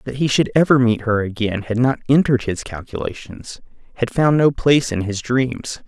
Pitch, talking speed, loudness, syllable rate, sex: 125 Hz, 195 wpm, -18 LUFS, 5.2 syllables/s, male